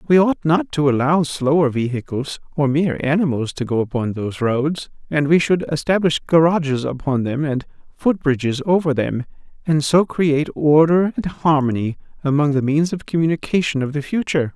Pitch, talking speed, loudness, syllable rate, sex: 150 Hz, 170 wpm, -19 LUFS, 5.3 syllables/s, male